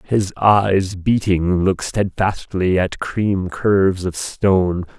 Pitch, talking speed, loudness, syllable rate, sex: 95 Hz, 120 wpm, -18 LUFS, 3.4 syllables/s, male